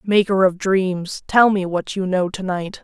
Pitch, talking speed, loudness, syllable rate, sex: 190 Hz, 210 wpm, -19 LUFS, 4.1 syllables/s, female